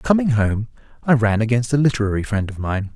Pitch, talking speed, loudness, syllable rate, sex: 115 Hz, 205 wpm, -19 LUFS, 5.8 syllables/s, male